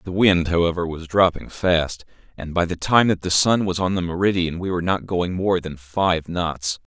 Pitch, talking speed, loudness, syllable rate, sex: 90 Hz, 215 wpm, -21 LUFS, 4.8 syllables/s, male